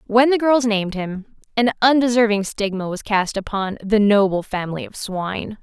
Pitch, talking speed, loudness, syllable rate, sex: 210 Hz, 170 wpm, -19 LUFS, 5.1 syllables/s, female